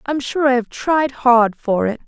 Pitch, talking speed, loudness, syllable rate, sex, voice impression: 255 Hz, 230 wpm, -17 LUFS, 4.2 syllables/s, female, feminine, slightly adult-like, slightly powerful, clear, slightly cute, slightly unique, slightly lively